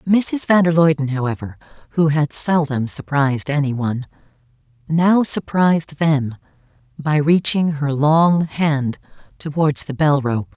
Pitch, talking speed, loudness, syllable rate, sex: 150 Hz, 130 wpm, -18 LUFS, 4.2 syllables/s, female